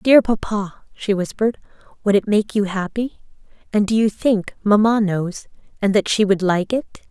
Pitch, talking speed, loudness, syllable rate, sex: 205 Hz, 175 wpm, -19 LUFS, 4.7 syllables/s, female